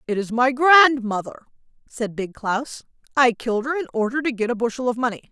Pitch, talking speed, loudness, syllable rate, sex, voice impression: 245 Hz, 205 wpm, -20 LUFS, 5.6 syllables/s, female, very feminine, very middle-aged, slightly thin, tensed, slightly powerful, slightly bright, hard, clear, fluent, slightly raspy, slightly cool, slightly intellectual, slightly refreshing, slightly sincere, slightly calm, slightly friendly, slightly reassuring, very unique, slightly elegant, wild, lively, very strict, very intense, very sharp